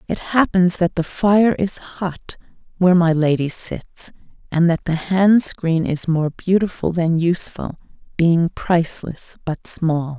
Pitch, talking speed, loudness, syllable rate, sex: 170 Hz, 145 wpm, -18 LUFS, 4.0 syllables/s, female